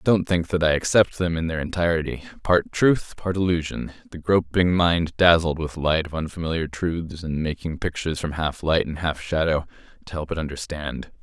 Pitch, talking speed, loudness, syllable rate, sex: 80 Hz, 180 wpm, -23 LUFS, 5.1 syllables/s, male